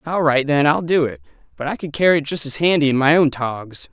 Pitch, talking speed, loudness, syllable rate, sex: 150 Hz, 275 wpm, -18 LUFS, 5.8 syllables/s, male